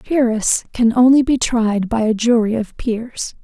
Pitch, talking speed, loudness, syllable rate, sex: 230 Hz, 190 wpm, -16 LUFS, 4.4 syllables/s, female